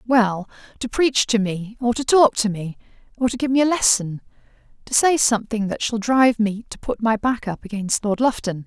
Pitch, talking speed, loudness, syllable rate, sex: 225 Hz, 215 wpm, -20 LUFS, 5.2 syllables/s, female